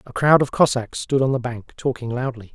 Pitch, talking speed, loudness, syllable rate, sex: 125 Hz, 235 wpm, -21 LUFS, 5.4 syllables/s, male